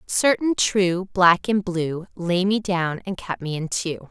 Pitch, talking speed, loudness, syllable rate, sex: 185 Hz, 190 wpm, -22 LUFS, 3.6 syllables/s, female